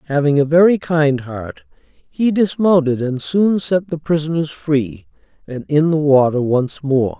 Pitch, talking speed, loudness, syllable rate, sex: 150 Hz, 160 wpm, -16 LUFS, 4.1 syllables/s, male